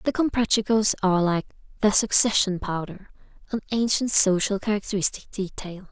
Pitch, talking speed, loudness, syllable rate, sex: 205 Hz, 120 wpm, -22 LUFS, 5.3 syllables/s, female